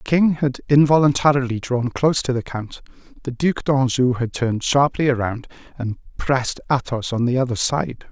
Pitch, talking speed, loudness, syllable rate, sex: 130 Hz, 170 wpm, -20 LUFS, 4.9 syllables/s, male